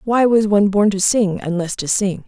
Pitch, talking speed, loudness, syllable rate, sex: 200 Hz, 240 wpm, -16 LUFS, 5.1 syllables/s, female